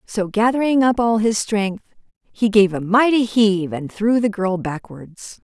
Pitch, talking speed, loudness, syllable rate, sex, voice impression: 210 Hz, 175 wpm, -18 LUFS, 4.3 syllables/s, female, very feminine, slightly young, slightly adult-like, slightly thin, very tensed, powerful, very bright, soft, very clear, fluent, very cute, slightly cool, intellectual, very refreshing, sincere, slightly calm, friendly, reassuring, very unique, slightly elegant, wild, sweet, very lively, kind, intense